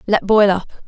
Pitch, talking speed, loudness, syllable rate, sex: 195 Hz, 205 wpm, -15 LUFS, 4.4 syllables/s, female